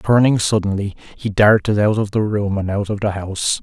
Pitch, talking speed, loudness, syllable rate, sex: 105 Hz, 230 wpm, -18 LUFS, 5.9 syllables/s, male